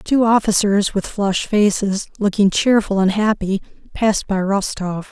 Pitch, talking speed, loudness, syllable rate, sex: 200 Hz, 140 wpm, -18 LUFS, 4.6 syllables/s, female